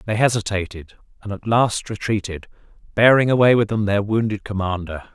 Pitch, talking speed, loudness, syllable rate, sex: 105 Hz, 150 wpm, -19 LUFS, 5.4 syllables/s, male